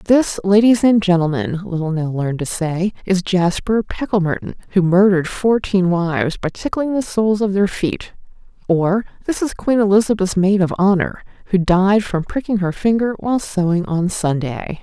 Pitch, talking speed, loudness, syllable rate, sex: 190 Hz, 165 wpm, -17 LUFS, 4.9 syllables/s, female